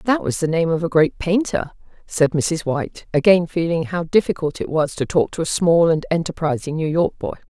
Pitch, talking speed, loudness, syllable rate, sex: 165 Hz, 215 wpm, -19 LUFS, 5.2 syllables/s, female